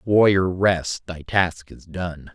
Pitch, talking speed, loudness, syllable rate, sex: 90 Hz, 155 wpm, -21 LUFS, 3.1 syllables/s, male